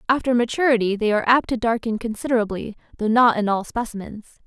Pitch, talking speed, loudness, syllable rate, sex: 230 Hz, 175 wpm, -21 LUFS, 6.5 syllables/s, female